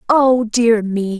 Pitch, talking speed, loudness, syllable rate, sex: 225 Hz, 150 wpm, -15 LUFS, 3.0 syllables/s, female